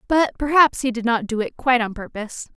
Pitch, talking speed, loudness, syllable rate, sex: 245 Hz, 230 wpm, -20 LUFS, 6.1 syllables/s, female